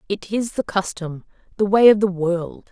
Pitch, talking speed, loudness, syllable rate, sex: 190 Hz, 200 wpm, -19 LUFS, 4.6 syllables/s, female